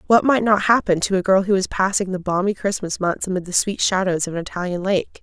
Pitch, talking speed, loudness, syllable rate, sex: 190 Hz, 255 wpm, -20 LUFS, 5.9 syllables/s, female